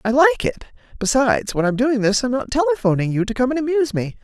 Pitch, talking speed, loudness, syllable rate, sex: 250 Hz, 240 wpm, -19 LUFS, 6.4 syllables/s, female